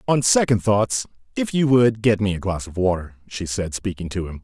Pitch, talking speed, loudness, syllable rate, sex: 105 Hz, 205 wpm, -21 LUFS, 5.2 syllables/s, male